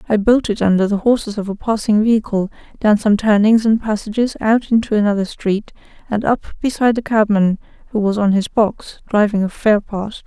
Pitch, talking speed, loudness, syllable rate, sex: 215 Hz, 185 wpm, -16 LUFS, 5.5 syllables/s, female